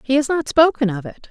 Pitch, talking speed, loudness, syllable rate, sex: 260 Hz, 275 wpm, -17 LUFS, 5.8 syllables/s, female